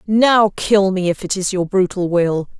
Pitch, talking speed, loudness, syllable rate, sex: 190 Hz, 210 wpm, -16 LUFS, 4.2 syllables/s, female